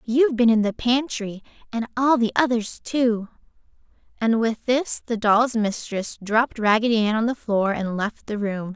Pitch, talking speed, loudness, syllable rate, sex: 225 Hz, 180 wpm, -22 LUFS, 4.6 syllables/s, female